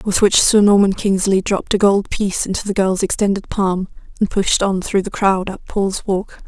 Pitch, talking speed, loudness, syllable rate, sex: 195 Hz, 215 wpm, -17 LUFS, 5.0 syllables/s, female